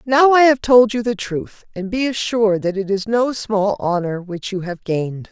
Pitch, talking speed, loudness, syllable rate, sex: 210 Hz, 225 wpm, -18 LUFS, 4.7 syllables/s, female